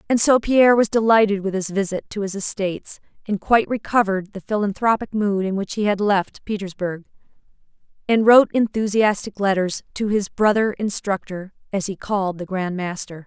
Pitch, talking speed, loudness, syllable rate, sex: 200 Hz, 165 wpm, -20 LUFS, 5.4 syllables/s, female